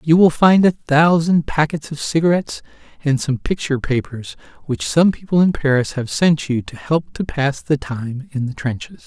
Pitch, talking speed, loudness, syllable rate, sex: 150 Hz, 190 wpm, -18 LUFS, 4.9 syllables/s, male